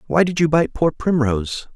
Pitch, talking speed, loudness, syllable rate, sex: 140 Hz, 205 wpm, -19 LUFS, 5.2 syllables/s, male